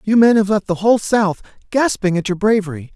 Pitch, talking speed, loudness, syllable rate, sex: 200 Hz, 225 wpm, -16 LUFS, 5.8 syllables/s, male